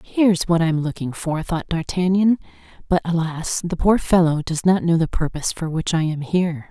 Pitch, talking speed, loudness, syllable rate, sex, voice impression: 170 Hz, 215 wpm, -20 LUFS, 5.5 syllables/s, female, very feminine, slightly middle-aged, thin, slightly tensed, weak, bright, soft, clear, fluent, cute, very intellectual, very refreshing, sincere, calm, very friendly, very reassuring, unique, very elegant, wild, very sweet, lively, very kind, modest, light